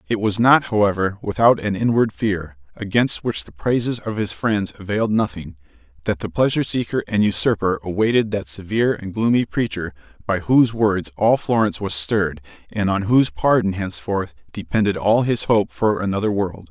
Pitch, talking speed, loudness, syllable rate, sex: 100 Hz, 170 wpm, -20 LUFS, 5.4 syllables/s, male